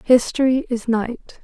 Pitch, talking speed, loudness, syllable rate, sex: 245 Hz, 125 wpm, -20 LUFS, 3.9 syllables/s, female